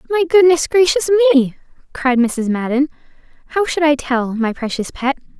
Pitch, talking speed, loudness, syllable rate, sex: 290 Hz, 155 wpm, -16 LUFS, 4.9 syllables/s, female